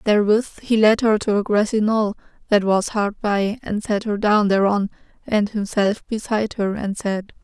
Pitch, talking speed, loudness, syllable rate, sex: 210 Hz, 185 wpm, -20 LUFS, 4.7 syllables/s, female